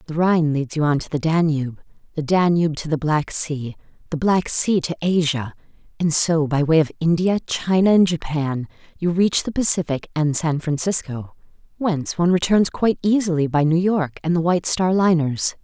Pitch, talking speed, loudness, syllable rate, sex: 165 Hz, 185 wpm, -20 LUFS, 5.2 syllables/s, female